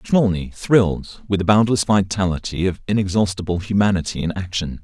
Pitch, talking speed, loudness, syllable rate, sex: 95 Hz, 135 wpm, -19 LUFS, 5.5 syllables/s, male